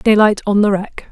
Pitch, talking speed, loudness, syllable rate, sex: 205 Hz, 215 wpm, -14 LUFS, 5.0 syllables/s, female